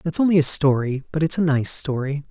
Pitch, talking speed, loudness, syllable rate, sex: 150 Hz, 235 wpm, -20 LUFS, 5.8 syllables/s, male